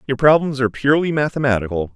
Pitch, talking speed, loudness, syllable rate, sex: 135 Hz, 155 wpm, -17 LUFS, 7.3 syllables/s, male